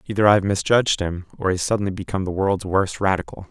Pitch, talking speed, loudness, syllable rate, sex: 95 Hz, 205 wpm, -21 LUFS, 6.8 syllables/s, male